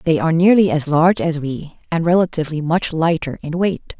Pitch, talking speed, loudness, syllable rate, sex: 165 Hz, 195 wpm, -17 LUFS, 5.7 syllables/s, female